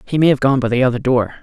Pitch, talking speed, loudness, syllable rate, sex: 130 Hz, 335 wpm, -15 LUFS, 7.3 syllables/s, male